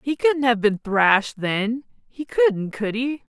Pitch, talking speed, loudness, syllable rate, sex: 240 Hz, 180 wpm, -21 LUFS, 3.8 syllables/s, female